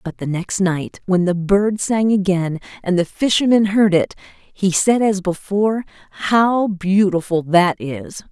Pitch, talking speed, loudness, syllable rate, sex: 190 Hz, 160 wpm, -18 LUFS, 4.0 syllables/s, female